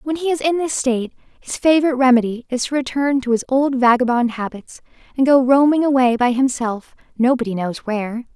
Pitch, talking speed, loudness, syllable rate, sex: 255 Hz, 185 wpm, -17 LUFS, 5.8 syllables/s, female